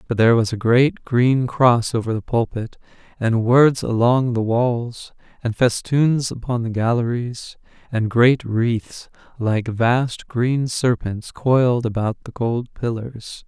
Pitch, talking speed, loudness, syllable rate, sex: 120 Hz, 145 wpm, -19 LUFS, 3.7 syllables/s, male